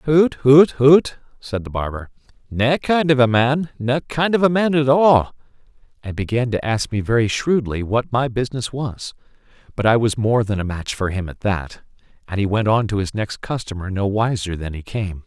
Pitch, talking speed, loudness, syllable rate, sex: 120 Hz, 210 wpm, -19 LUFS, 4.9 syllables/s, male